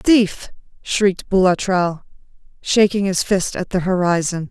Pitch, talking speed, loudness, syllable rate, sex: 190 Hz, 120 wpm, -18 LUFS, 4.7 syllables/s, female